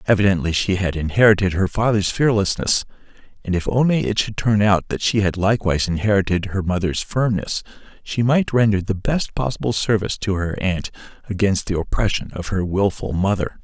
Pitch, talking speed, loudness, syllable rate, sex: 100 Hz, 170 wpm, -20 LUFS, 5.6 syllables/s, male